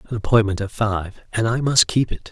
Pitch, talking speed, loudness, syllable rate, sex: 110 Hz, 285 wpm, -20 LUFS, 6.1 syllables/s, male